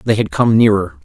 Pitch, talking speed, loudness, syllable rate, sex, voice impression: 110 Hz, 230 wpm, -13 LUFS, 5.5 syllables/s, male, very masculine, very adult-like, middle-aged, thick, slightly tensed, powerful, slightly bright, hard, clear, fluent, cool, very intellectual, refreshing, very sincere, calm, slightly mature, friendly, reassuring, slightly unique, elegant, slightly wild, sweet, slightly lively, kind, slightly modest